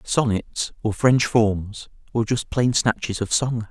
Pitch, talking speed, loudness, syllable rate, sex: 115 Hz, 160 wpm, -22 LUFS, 3.7 syllables/s, male